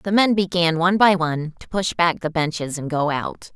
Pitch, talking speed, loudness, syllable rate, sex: 170 Hz, 235 wpm, -20 LUFS, 5.3 syllables/s, female